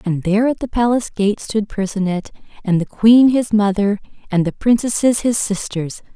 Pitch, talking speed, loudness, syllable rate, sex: 210 Hz, 175 wpm, -17 LUFS, 5.1 syllables/s, female